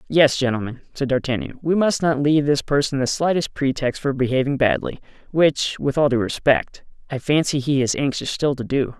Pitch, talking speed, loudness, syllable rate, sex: 140 Hz, 195 wpm, -20 LUFS, 5.3 syllables/s, male